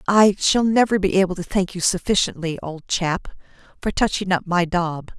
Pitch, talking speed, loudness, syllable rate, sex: 185 Hz, 185 wpm, -20 LUFS, 5.0 syllables/s, female